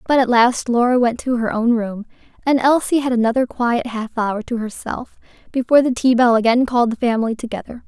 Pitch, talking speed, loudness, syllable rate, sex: 240 Hz, 205 wpm, -18 LUFS, 5.7 syllables/s, female